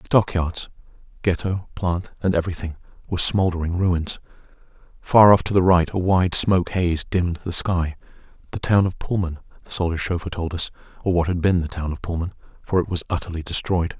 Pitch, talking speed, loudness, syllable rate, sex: 90 Hz, 180 wpm, -21 LUFS, 5.2 syllables/s, male